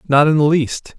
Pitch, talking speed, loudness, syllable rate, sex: 150 Hz, 245 wpm, -15 LUFS, 4.9 syllables/s, male